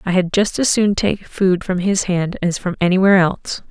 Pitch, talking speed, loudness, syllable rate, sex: 185 Hz, 225 wpm, -17 LUFS, 5.2 syllables/s, female